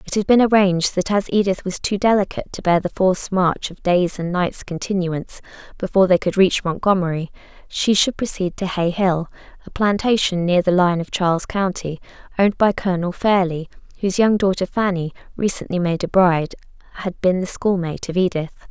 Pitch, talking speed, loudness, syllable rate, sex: 185 Hz, 185 wpm, -19 LUFS, 5.6 syllables/s, female